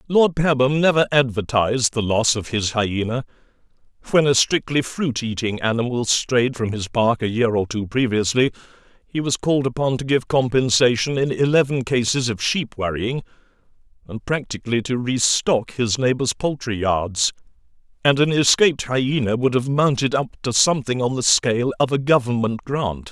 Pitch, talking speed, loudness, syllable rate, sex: 125 Hz, 165 wpm, -20 LUFS, 4.9 syllables/s, male